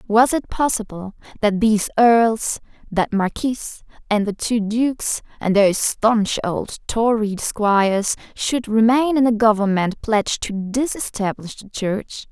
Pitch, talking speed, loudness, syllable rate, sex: 220 Hz, 135 wpm, -19 LUFS, 4.1 syllables/s, female